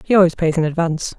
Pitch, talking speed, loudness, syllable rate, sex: 170 Hz, 255 wpm, -17 LUFS, 7.4 syllables/s, female